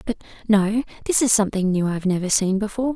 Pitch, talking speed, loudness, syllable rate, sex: 205 Hz, 205 wpm, -21 LUFS, 7.0 syllables/s, female